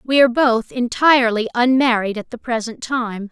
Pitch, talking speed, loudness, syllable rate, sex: 240 Hz, 165 wpm, -17 LUFS, 5.1 syllables/s, female